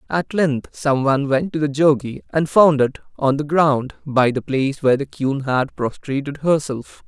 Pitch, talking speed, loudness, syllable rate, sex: 140 Hz, 195 wpm, -19 LUFS, 4.6 syllables/s, male